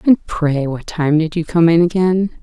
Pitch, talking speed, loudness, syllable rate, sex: 165 Hz, 225 wpm, -16 LUFS, 4.4 syllables/s, female